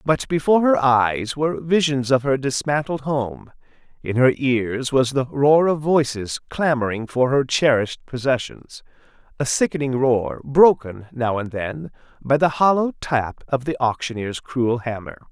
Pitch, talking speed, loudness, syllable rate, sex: 135 Hz, 150 wpm, -20 LUFS, 4.4 syllables/s, male